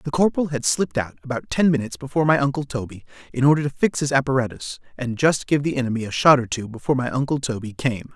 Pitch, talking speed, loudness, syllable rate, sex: 130 Hz, 235 wpm, -21 LUFS, 6.8 syllables/s, male